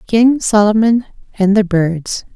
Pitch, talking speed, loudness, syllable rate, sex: 210 Hz, 130 wpm, -14 LUFS, 3.9 syllables/s, female